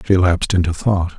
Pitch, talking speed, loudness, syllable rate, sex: 90 Hz, 205 wpm, -17 LUFS, 5.9 syllables/s, male